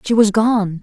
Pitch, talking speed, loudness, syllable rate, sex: 210 Hz, 215 wpm, -15 LUFS, 4.1 syllables/s, female